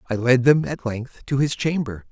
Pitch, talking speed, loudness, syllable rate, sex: 125 Hz, 225 wpm, -21 LUFS, 4.7 syllables/s, male